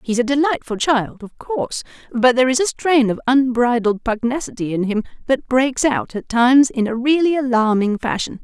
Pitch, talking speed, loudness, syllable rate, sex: 250 Hz, 185 wpm, -18 LUFS, 5.2 syllables/s, female